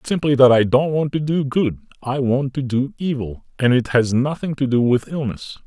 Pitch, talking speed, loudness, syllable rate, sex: 130 Hz, 235 wpm, -19 LUFS, 5.0 syllables/s, male